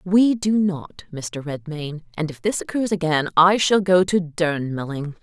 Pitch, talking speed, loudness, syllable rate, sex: 170 Hz, 170 wpm, -21 LUFS, 4.2 syllables/s, female